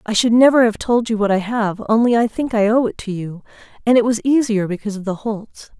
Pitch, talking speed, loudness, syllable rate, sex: 220 Hz, 260 wpm, -17 LUFS, 5.8 syllables/s, female